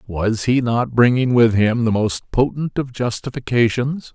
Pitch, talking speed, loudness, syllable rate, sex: 120 Hz, 160 wpm, -18 LUFS, 4.2 syllables/s, male